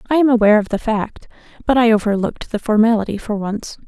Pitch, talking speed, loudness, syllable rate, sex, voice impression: 220 Hz, 200 wpm, -17 LUFS, 6.5 syllables/s, female, very feminine, slightly adult-like, thin, slightly tensed, slightly weak, bright, soft, slightly muffled, fluent, slightly raspy, cute, intellectual, very refreshing, sincere, calm, very mature, friendly, reassuring, unique, elegant, slightly wild, sweet, lively, strict, intense, slightly sharp, modest, slightly light